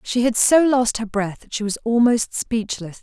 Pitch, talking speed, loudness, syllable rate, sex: 230 Hz, 220 wpm, -19 LUFS, 4.6 syllables/s, female